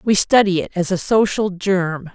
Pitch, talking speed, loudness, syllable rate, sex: 190 Hz, 195 wpm, -17 LUFS, 4.5 syllables/s, female